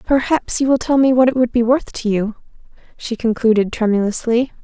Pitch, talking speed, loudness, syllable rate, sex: 240 Hz, 195 wpm, -17 LUFS, 5.4 syllables/s, female